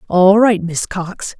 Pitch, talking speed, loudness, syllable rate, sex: 190 Hz, 170 wpm, -14 LUFS, 3.3 syllables/s, female